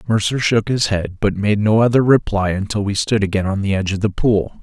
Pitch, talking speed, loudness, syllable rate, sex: 105 Hz, 245 wpm, -17 LUFS, 5.8 syllables/s, male